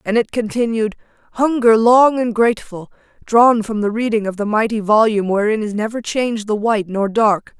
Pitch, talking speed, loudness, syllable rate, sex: 220 Hz, 180 wpm, -16 LUFS, 5.4 syllables/s, female